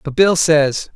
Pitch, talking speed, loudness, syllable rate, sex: 155 Hz, 190 wpm, -14 LUFS, 3.7 syllables/s, male